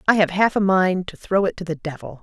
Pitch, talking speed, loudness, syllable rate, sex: 180 Hz, 295 wpm, -20 LUFS, 5.8 syllables/s, female